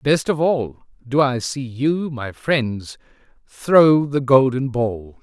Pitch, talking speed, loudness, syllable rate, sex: 130 Hz, 150 wpm, -19 LUFS, 3.1 syllables/s, male